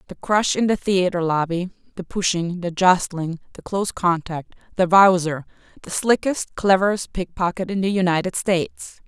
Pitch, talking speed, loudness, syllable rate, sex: 185 Hz, 140 wpm, -20 LUFS, 4.9 syllables/s, female